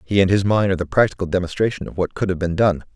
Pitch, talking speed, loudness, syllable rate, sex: 95 Hz, 285 wpm, -19 LUFS, 7.2 syllables/s, male